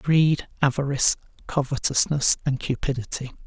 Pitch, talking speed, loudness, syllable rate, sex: 140 Hz, 85 wpm, -23 LUFS, 5.0 syllables/s, male